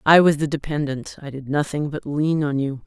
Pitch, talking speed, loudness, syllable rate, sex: 145 Hz, 210 wpm, -21 LUFS, 5.2 syllables/s, female